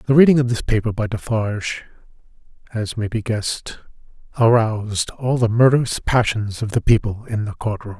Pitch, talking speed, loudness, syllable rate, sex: 110 Hz, 175 wpm, -19 LUFS, 5.3 syllables/s, male